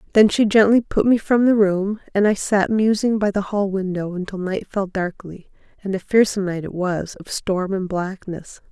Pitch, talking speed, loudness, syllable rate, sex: 195 Hz, 200 wpm, -20 LUFS, 4.8 syllables/s, female